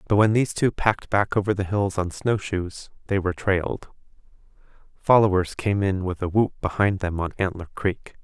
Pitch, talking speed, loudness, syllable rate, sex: 95 Hz, 180 wpm, -23 LUFS, 5.2 syllables/s, male